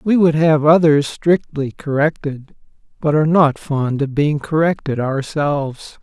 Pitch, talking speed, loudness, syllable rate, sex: 150 Hz, 140 wpm, -17 LUFS, 4.2 syllables/s, male